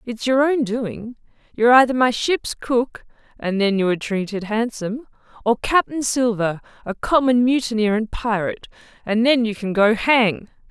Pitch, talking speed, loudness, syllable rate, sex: 230 Hz, 150 wpm, -19 LUFS, 4.7 syllables/s, female